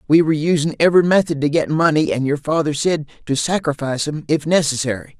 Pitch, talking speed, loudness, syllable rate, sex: 150 Hz, 195 wpm, -18 LUFS, 6.3 syllables/s, male